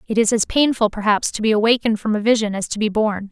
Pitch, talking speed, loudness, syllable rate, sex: 215 Hz, 270 wpm, -18 LUFS, 6.6 syllables/s, female